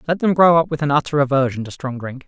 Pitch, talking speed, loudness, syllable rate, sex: 145 Hz, 290 wpm, -18 LUFS, 6.6 syllables/s, male